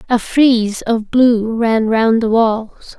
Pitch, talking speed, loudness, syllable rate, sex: 225 Hz, 160 wpm, -14 LUFS, 3.2 syllables/s, female